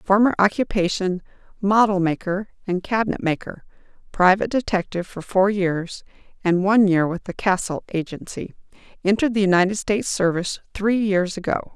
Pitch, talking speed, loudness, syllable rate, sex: 195 Hz, 140 wpm, -21 LUFS, 5.5 syllables/s, female